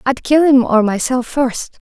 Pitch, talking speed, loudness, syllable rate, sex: 255 Hz, 190 wpm, -14 LUFS, 4.1 syllables/s, female